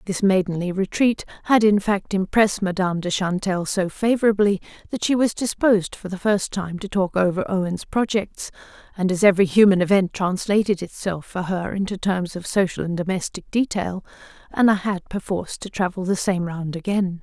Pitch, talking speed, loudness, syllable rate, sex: 190 Hz, 175 wpm, -21 LUFS, 5.4 syllables/s, female